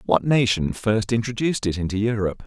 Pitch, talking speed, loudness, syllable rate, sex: 110 Hz, 170 wpm, -22 LUFS, 6.0 syllables/s, male